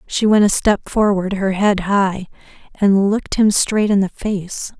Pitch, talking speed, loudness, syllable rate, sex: 200 Hz, 190 wpm, -16 LUFS, 4.1 syllables/s, female